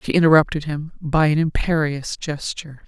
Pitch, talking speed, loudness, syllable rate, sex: 155 Hz, 145 wpm, -20 LUFS, 5.3 syllables/s, female